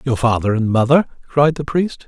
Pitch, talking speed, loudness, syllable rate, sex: 130 Hz, 205 wpm, -17 LUFS, 5.2 syllables/s, male